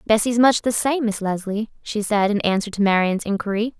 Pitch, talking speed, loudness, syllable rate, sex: 215 Hz, 205 wpm, -20 LUFS, 5.4 syllables/s, female